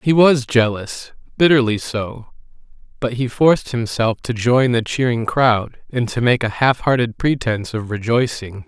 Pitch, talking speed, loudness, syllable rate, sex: 120 Hz, 150 wpm, -18 LUFS, 4.5 syllables/s, male